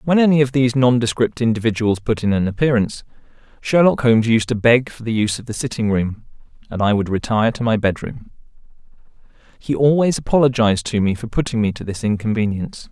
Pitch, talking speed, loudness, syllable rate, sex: 115 Hz, 190 wpm, -18 LUFS, 6.3 syllables/s, male